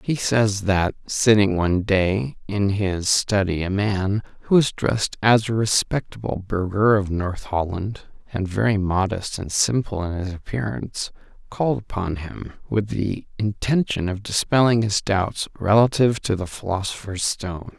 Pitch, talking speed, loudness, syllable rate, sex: 100 Hz, 150 wpm, -22 LUFS, 4.4 syllables/s, male